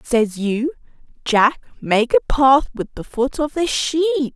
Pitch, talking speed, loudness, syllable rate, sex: 265 Hz, 165 wpm, -18 LUFS, 3.9 syllables/s, female